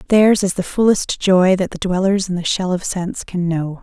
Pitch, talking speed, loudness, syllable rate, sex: 185 Hz, 235 wpm, -17 LUFS, 5.0 syllables/s, female